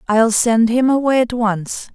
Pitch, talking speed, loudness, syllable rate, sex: 230 Hz, 185 wpm, -15 LUFS, 4.1 syllables/s, female